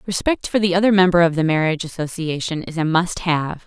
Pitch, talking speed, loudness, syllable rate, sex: 170 Hz, 215 wpm, -19 LUFS, 6.0 syllables/s, female